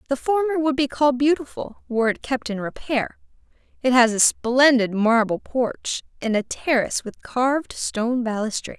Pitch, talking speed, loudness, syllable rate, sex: 250 Hz, 165 wpm, -21 LUFS, 5.1 syllables/s, female